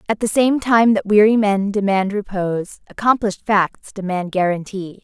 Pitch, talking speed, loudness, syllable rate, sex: 205 Hz, 155 wpm, -17 LUFS, 4.8 syllables/s, female